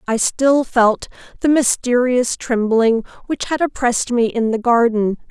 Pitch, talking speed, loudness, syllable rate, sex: 240 Hz, 145 wpm, -17 LUFS, 4.3 syllables/s, female